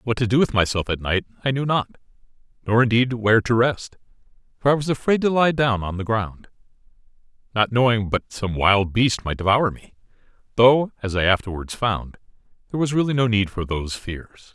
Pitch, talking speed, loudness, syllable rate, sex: 115 Hz, 195 wpm, -21 LUFS, 5.4 syllables/s, male